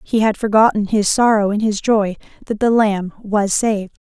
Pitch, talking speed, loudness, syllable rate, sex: 210 Hz, 190 wpm, -16 LUFS, 4.9 syllables/s, female